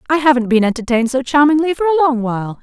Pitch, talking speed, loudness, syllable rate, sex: 270 Hz, 230 wpm, -15 LUFS, 7.6 syllables/s, female